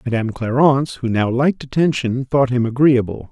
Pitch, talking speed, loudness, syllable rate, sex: 130 Hz, 165 wpm, -17 LUFS, 5.7 syllables/s, male